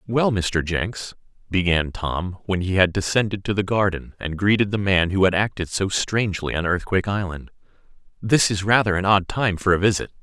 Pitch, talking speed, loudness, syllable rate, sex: 95 Hz, 195 wpm, -21 LUFS, 5.2 syllables/s, male